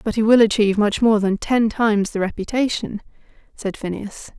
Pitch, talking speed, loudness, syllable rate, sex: 215 Hz, 180 wpm, -19 LUFS, 5.4 syllables/s, female